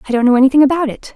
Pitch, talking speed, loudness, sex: 265 Hz, 315 wpm, -13 LUFS, female